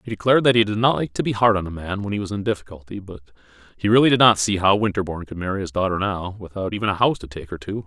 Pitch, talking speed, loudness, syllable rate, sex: 100 Hz, 300 wpm, -20 LUFS, 7.4 syllables/s, male